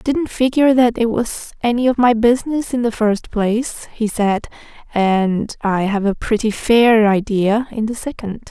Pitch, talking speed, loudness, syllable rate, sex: 225 Hz, 175 wpm, -17 LUFS, 4.4 syllables/s, female